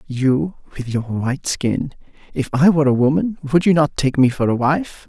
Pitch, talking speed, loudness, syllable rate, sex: 140 Hz, 215 wpm, -18 LUFS, 5.0 syllables/s, male